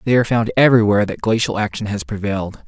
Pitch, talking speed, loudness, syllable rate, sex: 110 Hz, 200 wpm, -17 LUFS, 7.2 syllables/s, male